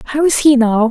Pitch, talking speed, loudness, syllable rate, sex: 260 Hz, 265 wpm, -12 LUFS, 6.4 syllables/s, female